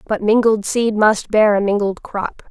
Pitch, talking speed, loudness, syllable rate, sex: 210 Hz, 190 wpm, -16 LUFS, 4.3 syllables/s, female